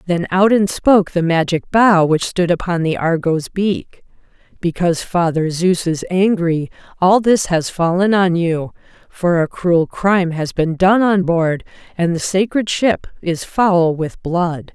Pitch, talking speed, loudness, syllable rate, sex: 175 Hz, 165 wpm, -16 LUFS, 4.0 syllables/s, female